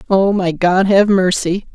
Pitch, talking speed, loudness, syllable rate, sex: 190 Hz, 170 wpm, -14 LUFS, 4.0 syllables/s, female